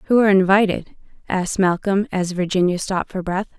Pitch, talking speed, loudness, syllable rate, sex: 190 Hz, 170 wpm, -19 LUFS, 6.1 syllables/s, female